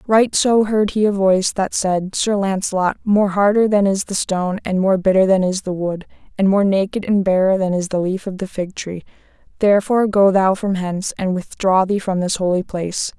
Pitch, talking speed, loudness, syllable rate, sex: 195 Hz, 220 wpm, -17 LUFS, 5.3 syllables/s, female